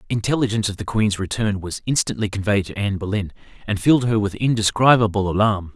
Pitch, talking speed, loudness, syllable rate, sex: 105 Hz, 175 wpm, -20 LUFS, 6.4 syllables/s, male